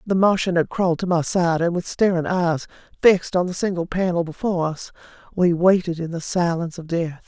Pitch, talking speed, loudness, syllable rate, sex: 175 Hz, 205 wpm, -21 LUFS, 5.6 syllables/s, female